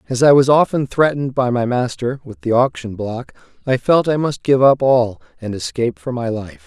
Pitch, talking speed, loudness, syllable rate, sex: 125 Hz, 215 wpm, -17 LUFS, 5.3 syllables/s, male